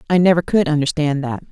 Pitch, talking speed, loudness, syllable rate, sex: 155 Hz, 200 wpm, -17 LUFS, 6.3 syllables/s, female